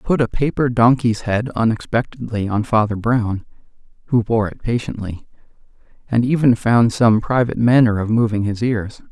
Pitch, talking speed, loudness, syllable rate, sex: 115 Hz, 160 wpm, -18 LUFS, 5.1 syllables/s, male